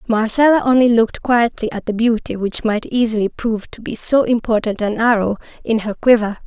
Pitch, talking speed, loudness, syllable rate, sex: 225 Hz, 185 wpm, -17 LUFS, 5.5 syllables/s, female